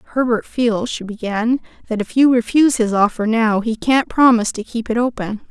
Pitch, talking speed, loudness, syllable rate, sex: 230 Hz, 195 wpm, -17 LUFS, 5.4 syllables/s, female